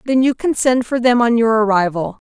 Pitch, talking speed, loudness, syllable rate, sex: 235 Hz, 235 wpm, -15 LUFS, 5.4 syllables/s, female